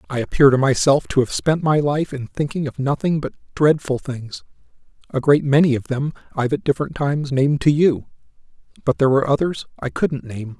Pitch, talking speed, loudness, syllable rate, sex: 140 Hz, 200 wpm, -19 LUFS, 5.8 syllables/s, male